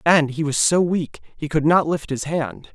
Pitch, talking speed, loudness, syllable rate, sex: 155 Hz, 240 wpm, -20 LUFS, 4.4 syllables/s, male